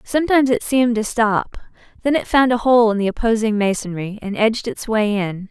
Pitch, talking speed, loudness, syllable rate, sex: 225 Hz, 205 wpm, -18 LUFS, 5.8 syllables/s, female